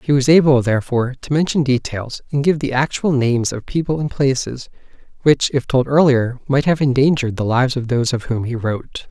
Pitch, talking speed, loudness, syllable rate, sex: 130 Hz, 205 wpm, -17 LUFS, 5.8 syllables/s, male